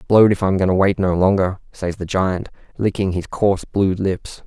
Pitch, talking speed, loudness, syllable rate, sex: 95 Hz, 215 wpm, -19 LUFS, 5.1 syllables/s, male